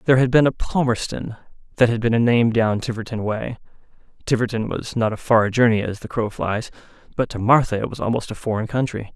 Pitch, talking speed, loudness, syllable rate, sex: 115 Hz, 210 wpm, -21 LUFS, 5.9 syllables/s, male